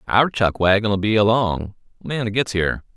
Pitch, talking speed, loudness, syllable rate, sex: 105 Hz, 180 wpm, -19 LUFS, 4.9 syllables/s, male